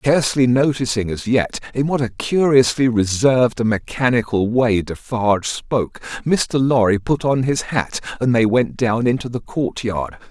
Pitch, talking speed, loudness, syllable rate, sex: 120 Hz, 155 wpm, -18 LUFS, 4.6 syllables/s, male